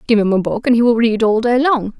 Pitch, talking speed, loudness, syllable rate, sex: 230 Hz, 330 wpm, -14 LUFS, 6.0 syllables/s, female